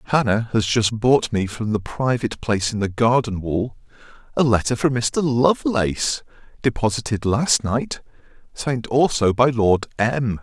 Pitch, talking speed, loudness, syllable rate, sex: 115 Hz, 150 wpm, -20 LUFS, 4.7 syllables/s, male